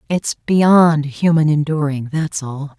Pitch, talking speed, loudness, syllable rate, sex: 150 Hz, 110 wpm, -16 LUFS, 3.6 syllables/s, female